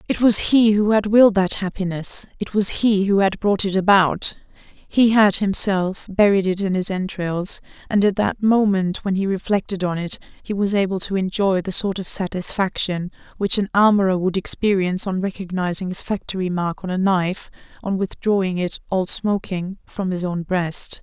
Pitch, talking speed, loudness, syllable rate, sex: 190 Hz, 185 wpm, -20 LUFS, 4.9 syllables/s, female